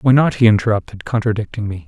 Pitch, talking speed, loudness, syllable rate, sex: 115 Hz, 190 wpm, -17 LUFS, 6.6 syllables/s, male